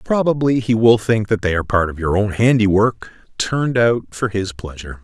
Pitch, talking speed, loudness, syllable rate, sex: 105 Hz, 205 wpm, -17 LUFS, 5.4 syllables/s, male